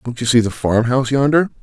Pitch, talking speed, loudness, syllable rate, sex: 125 Hz, 260 wpm, -16 LUFS, 6.3 syllables/s, male